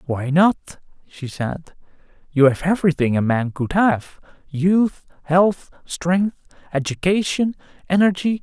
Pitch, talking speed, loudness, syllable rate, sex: 165 Hz, 105 wpm, -19 LUFS, 4.1 syllables/s, male